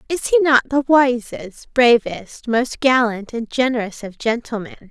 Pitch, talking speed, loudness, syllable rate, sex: 240 Hz, 145 wpm, -18 LUFS, 4.3 syllables/s, female